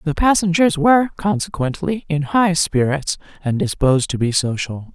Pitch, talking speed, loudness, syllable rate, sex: 170 Hz, 145 wpm, -18 LUFS, 4.9 syllables/s, female